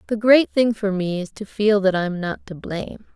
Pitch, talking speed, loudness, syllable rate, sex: 205 Hz, 250 wpm, -20 LUFS, 4.8 syllables/s, female